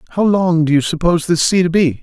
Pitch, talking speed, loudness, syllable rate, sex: 170 Hz, 265 wpm, -14 LUFS, 6.5 syllables/s, male